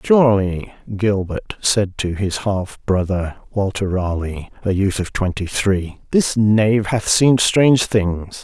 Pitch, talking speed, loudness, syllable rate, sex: 100 Hz, 140 wpm, -18 LUFS, 3.8 syllables/s, male